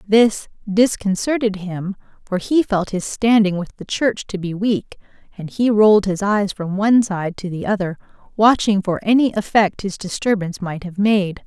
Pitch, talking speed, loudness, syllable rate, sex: 200 Hz, 180 wpm, -18 LUFS, 4.7 syllables/s, female